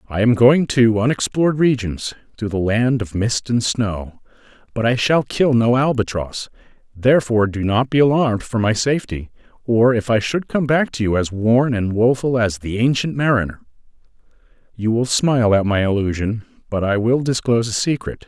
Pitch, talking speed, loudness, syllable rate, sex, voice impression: 115 Hz, 180 wpm, -18 LUFS, 5.1 syllables/s, male, very masculine, very middle-aged, thick, tensed, very powerful, very bright, slightly soft, very clear, very fluent, slightly raspy, very cool, intellectual, refreshing, sincere, slightly calm, mature, very friendly, very reassuring, very unique, slightly elegant, very wild, slightly sweet, very lively, slightly kind, intense